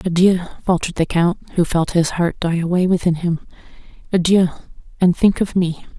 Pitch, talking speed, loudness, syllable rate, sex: 175 Hz, 170 wpm, -18 LUFS, 5.4 syllables/s, female